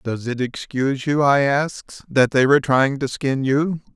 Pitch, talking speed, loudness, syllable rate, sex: 135 Hz, 195 wpm, -19 LUFS, 4.3 syllables/s, male